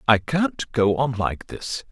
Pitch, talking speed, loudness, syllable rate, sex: 125 Hz, 190 wpm, -23 LUFS, 3.4 syllables/s, male